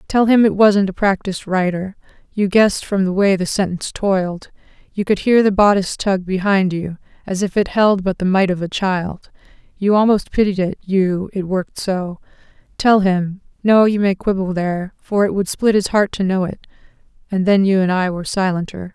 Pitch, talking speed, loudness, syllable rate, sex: 190 Hz, 205 wpm, -17 LUFS, 5.3 syllables/s, female